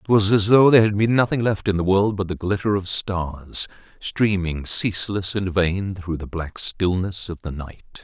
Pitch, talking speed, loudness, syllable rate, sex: 95 Hz, 210 wpm, -21 LUFS, 4.7 syllables/s, male